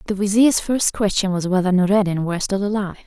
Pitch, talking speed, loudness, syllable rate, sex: 195 Hz, 195 wpm, -19 LUFS, 6.4 syllables/s, female